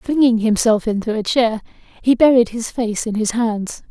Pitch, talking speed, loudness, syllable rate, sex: 230 Hz, 185 wpm, -17 LUFS, 4.7 syllables/s, female